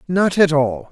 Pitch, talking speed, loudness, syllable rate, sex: 160 Hz, 195 wpm, -16 LUFS, 4.1 syllables/s, male